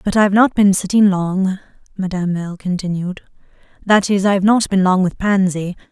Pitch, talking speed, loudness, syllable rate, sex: 190 Hz, 175 wpm, -16 LUFS, 5.5 syllables/s, female